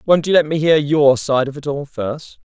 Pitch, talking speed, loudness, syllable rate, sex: 145 Hz, 260 wpm, -16 LUFS, 4.8 syllables/s, male